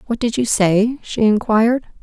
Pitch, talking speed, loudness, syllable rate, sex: 225 Hz, 180 wpm, -17 LUFS, 4.8 syllables/s, female